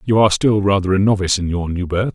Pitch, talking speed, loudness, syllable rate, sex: 100 Hz, 280 wpm, -17 LUFS, 6.8 syllables/s, male